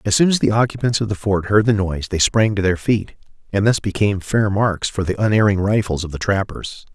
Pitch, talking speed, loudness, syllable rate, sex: 100 Hz, 240 wpm, -18 LUFS, 5.8 syllables/s, male